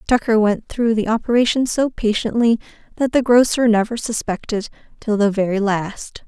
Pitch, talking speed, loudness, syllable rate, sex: 225 Hz, 155 wpm, -18 LUFS, 5.0 syllables/s, female